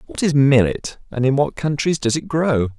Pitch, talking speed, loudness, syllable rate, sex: 135 Hz, 215 wpm, -18 LUFS, 4.7 syllables/s, male